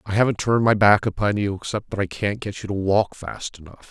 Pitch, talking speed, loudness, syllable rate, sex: 100 Hz, 260 wpm, -21 LUFS, 5.8 syllables/s, male